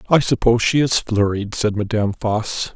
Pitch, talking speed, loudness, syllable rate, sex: 110 Hz, 175 wpm, -18 LUFS, 5.3 syllables/s, male